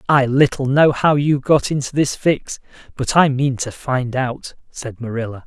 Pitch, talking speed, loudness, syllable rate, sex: 135 Hz, 185 wpm, -18 LUFS, 4.4 syllables/s, male